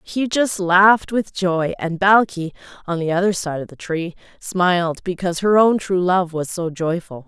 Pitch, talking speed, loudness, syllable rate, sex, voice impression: 180 Hz, 190 wpm, -19 LUFS, 4.6 syllables/s, female, feminine, slightly gender-neutral, slightly young, adult-like, thin, tensed, slightly powerful, slightly bright, hard, clear, fluent, slightly raspy, slightly cool, intellectual, slightly refreshing, sincere, slightly calm, friendly, reassuring, slightly elegant, slightly sweet, lively, slightly strict, slightly intense, slightly sharp